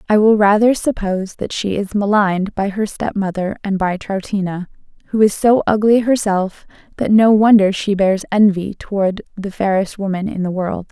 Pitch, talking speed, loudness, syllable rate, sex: 200 Hz, 175 wpm, -16 LUFS, 5.0 syllables/s, female